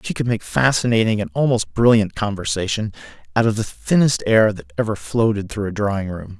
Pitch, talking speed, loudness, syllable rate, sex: 105 Hz, 190 wpm, -19 LUFS, 5.6 syllables/s, male